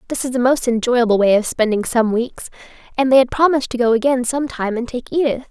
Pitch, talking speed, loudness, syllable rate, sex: 245 Hz, 240 wpm, -17 LUFS, 6.0 syllables/s, female